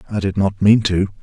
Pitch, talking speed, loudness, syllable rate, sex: 100 Hz, 245 wpm, -16 LUFS, 5.2 syllables/s, male